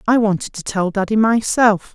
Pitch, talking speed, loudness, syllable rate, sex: 210 Hz, 185 wpm, -17 LUFS, 5.0 syllables/s, female